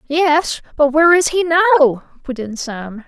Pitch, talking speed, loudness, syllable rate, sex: 295 Hz, 175 wpm, -15 LUFS, 4.7 syllables/s, female